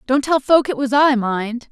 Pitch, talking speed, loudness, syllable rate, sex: 260 Hz, 245 wpm, -17 LUFS, 4.4 syllables/s, female